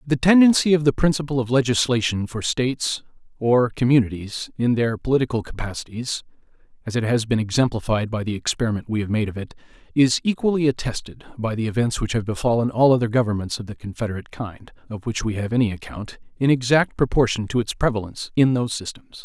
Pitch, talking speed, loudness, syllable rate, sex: 120 Hz, 185 wpm, -21 LUFS, 6.2 syllables/s, male